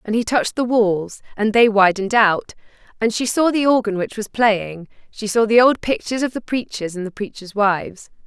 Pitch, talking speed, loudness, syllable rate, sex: 220 Hz, 210 wpm, -18 LUFS, 5.3 syllables/s, female